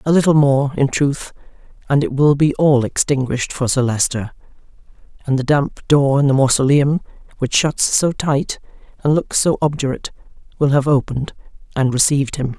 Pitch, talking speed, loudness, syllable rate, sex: 140 Hz, 165 wpm, -17 LUFS, 5.4 syllables/s, female